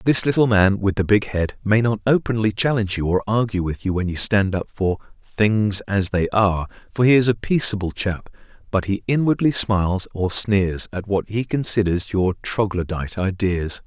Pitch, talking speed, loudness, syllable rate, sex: 100 Hz, 185 wpm, -20 LUFS, 5.0 syllables/s, male